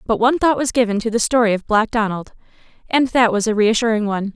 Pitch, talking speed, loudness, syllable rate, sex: 225 Hz, 235 wpm, -17 LUFS, 6.5 syllables/s, female